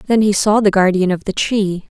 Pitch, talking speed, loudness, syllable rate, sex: 200 Hz, 240 wpm, -15 LUFS, 4.8 syllables/s, female